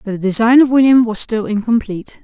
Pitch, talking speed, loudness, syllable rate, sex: 225 Hz, 215 wpm, -13 LUFS, 6.1 syllables/s, female